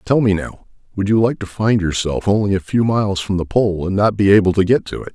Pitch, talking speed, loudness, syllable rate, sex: 100 Hz, 280 wpm, -17 LUFS, 5.9 syllables/s, male